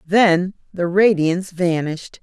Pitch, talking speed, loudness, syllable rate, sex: 180 Hz, 110 wpm, -18 LUFS, 4.1 syllables/s, female